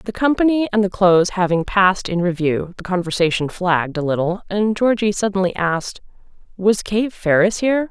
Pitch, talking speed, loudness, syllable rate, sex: 195 Hz, 165 wpm, -18 LUFS, 5.4 syllables/s, female